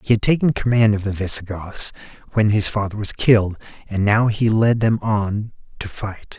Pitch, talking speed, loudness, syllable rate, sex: 105 Hz, 190 wpm, -19 LUFS, 4.9 syllables/s, male